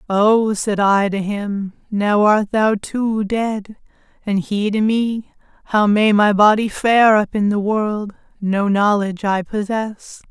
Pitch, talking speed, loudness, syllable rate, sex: 210 Hz, 155 wpm, -17 LUFS, 3.5 syllables/s, female